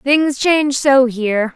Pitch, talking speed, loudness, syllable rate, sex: 265 Hz, 155 wpm, -14 LUFS, 4.0 syllables/s, female